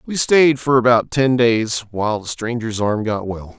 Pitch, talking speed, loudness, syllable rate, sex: 115 Hz, 200 wpm, -17 LUFS, 4.4 syllables/s, male